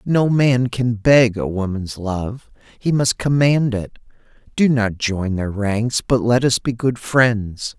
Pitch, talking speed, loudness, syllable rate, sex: 120 Hz, 170 wpm, -18 LUFS, 3.5 syllables/s, male